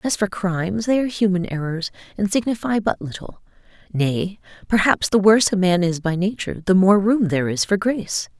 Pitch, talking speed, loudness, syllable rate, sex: 190 Hz, 195 wpm, -20 LUFS, 5.6 syllables/s, female